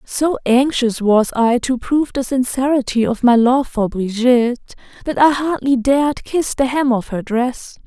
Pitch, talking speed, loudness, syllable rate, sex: 255 Hz, 175 wpm, -16 LUFS, 4.6 syllables/s, female